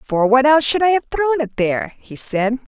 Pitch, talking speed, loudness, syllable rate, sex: 270 Hz, 240 wpm, -17 LUFS, 5.9 syllables/s, female